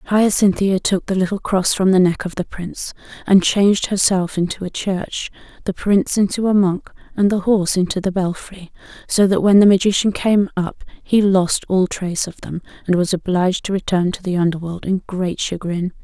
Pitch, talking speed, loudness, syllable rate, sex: 190 Hz, 195 wpm, -18 LUFS, 5.1 syllables/s, female